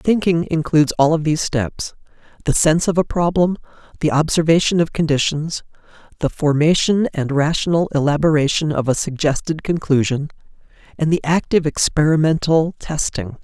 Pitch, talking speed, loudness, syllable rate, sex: 155 Hz, 125 wpm, -18 LUFS, 5.3 syllables/s, male